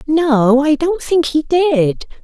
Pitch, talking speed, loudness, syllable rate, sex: 295 Hz, 160 wpm, -14 LUFS, 3.1 syllables/s, female